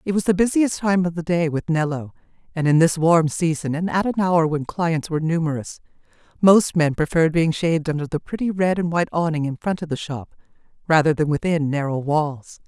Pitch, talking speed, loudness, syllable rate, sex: 165 Hz, 215 wpm, -20 LUFS, 5.7 syllables/s, female